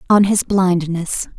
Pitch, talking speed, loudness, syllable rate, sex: 185 Hz, 130 wpm, -16 LUFS, 3.6 syllables/s, female